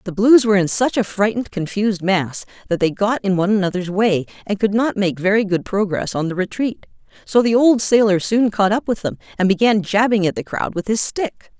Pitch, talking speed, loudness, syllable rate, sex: 205 Hz, 230 wpm, -18 LUFS, 5.6 syllables/s, female